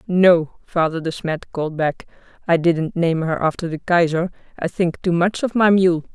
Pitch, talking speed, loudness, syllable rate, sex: 170 Hz, 195 wpm, -19 LUFS, 4.6 syllables/s, female